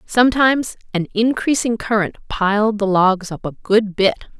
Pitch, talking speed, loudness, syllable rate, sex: 215 Hz, 150 wpm, -17 LUFS, 4.9 syllables/s, female